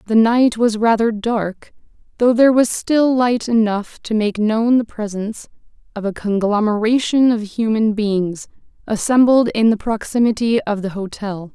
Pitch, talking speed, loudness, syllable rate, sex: 220 Hz, 150 wpm, -17 LUFS, 4.5 syllables/s, female